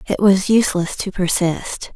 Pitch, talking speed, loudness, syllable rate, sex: 190 Hz, 155 wpm, -17 LUFS, 4.5 syllables/s, female